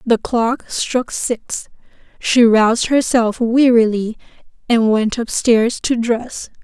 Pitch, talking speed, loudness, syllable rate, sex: 235 Hz, 120 wpm, -16 LUFS, 3.3 syllables/s, female